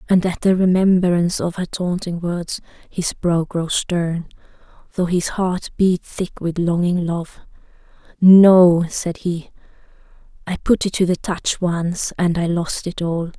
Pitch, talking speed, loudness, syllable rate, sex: 175 Hz, 155 wpm, -18 LUFS, 3.9 syllables/s, female